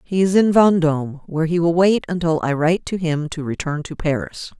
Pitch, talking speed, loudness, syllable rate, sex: 165 Hz, 220 wpm, -19 LUFS, 5.6 syllables/s, female